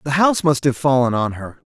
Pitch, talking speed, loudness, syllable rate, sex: 140 Hz, 255 wpm, -17 LUFS, 5.8 syllables/s, male